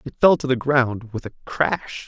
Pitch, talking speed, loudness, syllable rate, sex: 130 Hz, 230 wpm, -20 LUFS, 4.3 syllables/s, male